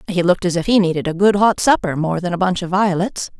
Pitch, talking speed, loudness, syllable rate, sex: 185 Hz, 280 wpm, -17 LUFS, 6.3 syllables/s, female